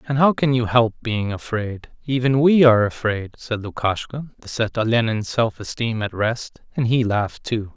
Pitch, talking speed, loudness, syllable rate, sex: 115 Hz, 185 wpm, -20 LUFS, 4.8 syllables/s, male